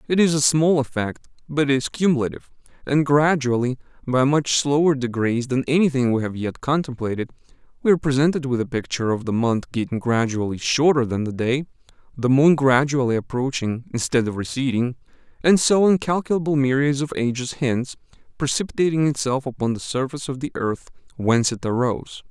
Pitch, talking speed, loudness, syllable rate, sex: 135 Hz, 165 wpm, -21 LUFS, 5.8 syllables/s, male